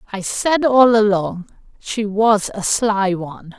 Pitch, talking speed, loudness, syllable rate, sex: 210 Hz, 150 wpm, -17 LUFS, 3.7 syllables/s, female